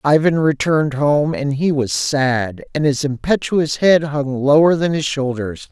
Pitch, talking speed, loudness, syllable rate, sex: 145 Hz, 170 wpm, -17 LUFS, 4.2 syllables/s, male